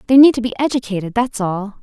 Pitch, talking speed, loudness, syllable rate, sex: 230 Hz, 230 wpm, -16 LUFS, 6.6 syllables/s, female